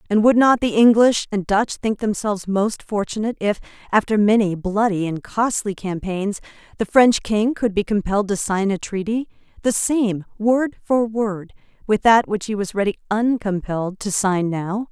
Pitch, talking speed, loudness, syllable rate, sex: 210 Hz, 175 wpm, -20 LUFS, 4.7 syllables/s, female